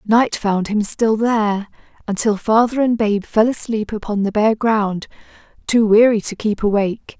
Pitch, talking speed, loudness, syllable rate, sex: 215 Hz, 165 wpm, -17 LUFS, 4.6 syllables/s, female